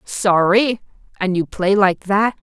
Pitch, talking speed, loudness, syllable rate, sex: 195 Hz, 120 wpm, -17 LUFS, 3.6 syllables/s, female